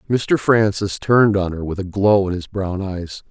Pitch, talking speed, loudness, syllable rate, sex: 100 Hz, 220 wpm, -18 LUFS, 4.6 syllables/s, male